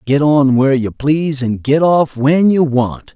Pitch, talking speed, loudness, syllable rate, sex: 140 Hz, 210 wpm, -13 LUFS, 4.3 syllables/s, male